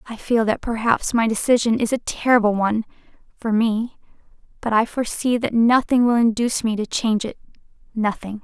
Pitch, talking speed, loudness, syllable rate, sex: 225 Hz, 155 wpm, -20 LUFS, 5.6 syllables/s, female